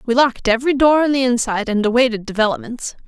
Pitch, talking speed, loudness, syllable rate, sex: 245 Hz, 195 wpm, -17 LUFS, 7.0 syllables/s, female